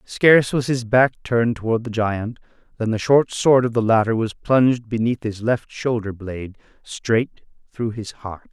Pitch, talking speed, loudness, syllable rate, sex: 115 Hz, 185 wpm, -20 LUFS, 4.6 syllables/s, male